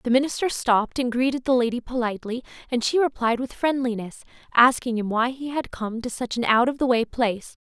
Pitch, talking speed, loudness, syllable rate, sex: 245 Hz, 210 wpm, -23 LUFS, 5.8 syllables/s, female